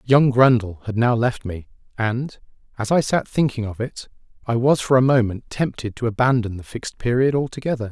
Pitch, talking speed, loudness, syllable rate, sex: 120 Hz, 190 wpm, -20 LUFS, 5.4 syllables/s, male